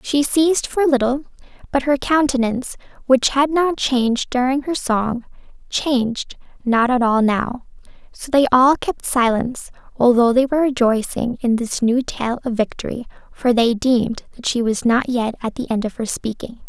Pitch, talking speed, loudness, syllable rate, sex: 250 Hz, 175 wpm, -18 LUFS, 4.9 syllables/s, female